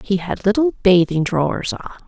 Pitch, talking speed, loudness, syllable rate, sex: 200 Hz, 175 wpm, -18 LUFS, 4.9 syllables/s, female